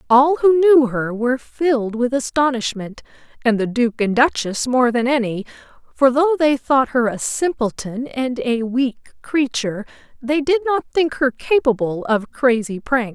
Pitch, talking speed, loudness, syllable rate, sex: 255 Hz, 165 wpm, -18 LUFS, 4.4 syllables/s, female